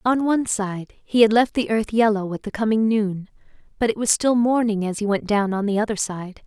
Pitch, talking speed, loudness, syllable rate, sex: 215 Hz, 240 wpm, -21 LUFS, 5.3 syllables/s, female